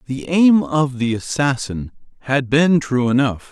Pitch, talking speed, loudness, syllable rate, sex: 135 Hz, 155 wpm, -17 LUFS, 4.0 syllables/s, male